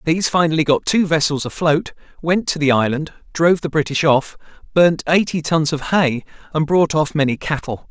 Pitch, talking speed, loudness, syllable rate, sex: 155 Hz, 180 wpm, -17 LUFS, 5.3 syllables/s, male